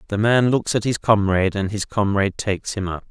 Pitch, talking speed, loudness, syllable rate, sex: 105 Hz, 230 wpm, -20 LUFS, 6.0 syllables/s, male